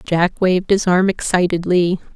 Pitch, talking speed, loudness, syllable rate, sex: 180 Hz, 140 wpm, -17 LUFS, 4.7 syllables/s, female